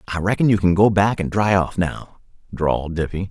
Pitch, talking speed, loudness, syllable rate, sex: 95 Hz, 220 wpm, -19 LUFS, 5.6 syllables/s, male